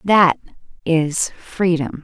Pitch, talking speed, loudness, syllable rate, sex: 170 Hz, 90 wpm, -18 LUFS, 3.0 syllables/s, female